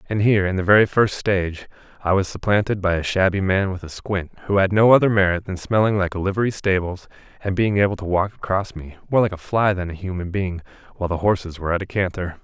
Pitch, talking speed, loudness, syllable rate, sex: 95 Hz, 240 wpm, -20 LUFS, 6.3 syllables/s, male